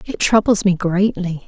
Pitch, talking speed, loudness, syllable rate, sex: 190 Hz, 165 wpm, -17 LUFS, 4.4 syllables/s, female